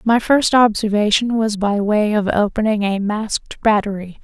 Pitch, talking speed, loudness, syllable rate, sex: 215 Hz, 155 wpm, -17 LUFS, 4.6 syllables/s, female